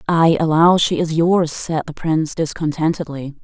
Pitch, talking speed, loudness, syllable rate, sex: 160 Hz, 155 wpm, -17 LUFS, 4.8 syllables/s, female